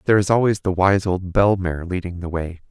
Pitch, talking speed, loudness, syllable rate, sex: 95 Hz, 245 wpm, -20 LUFS, 5.6 syllables/s, male